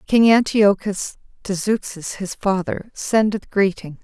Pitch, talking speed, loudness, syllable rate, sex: 200 Hz, 120 wpm, -19 LUFS, 3.9 syllables/s, female